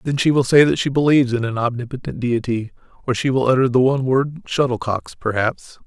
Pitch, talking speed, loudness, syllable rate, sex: 130 Hz, 215 wpm, -18 LUFS, 5.9 syllables/s, male